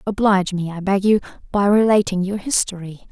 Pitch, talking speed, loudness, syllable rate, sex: 195 Hz, 175 wpm, -18 LUFS, 5.7 syllables/s, female